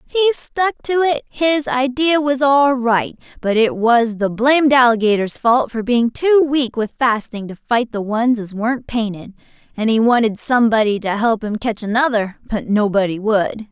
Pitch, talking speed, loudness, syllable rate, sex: 240 Hz, 180 wpm, -17 LUFS, 4.6 syllables/s, female